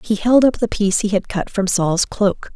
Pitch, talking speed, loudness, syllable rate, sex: 205 Hz, 260 wpm, -17 LUFS, 4.9 syllables/s, female